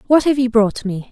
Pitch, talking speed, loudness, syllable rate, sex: 235 Hz, 270 wpm, -16 LUFS, 5.4 syllables/s, female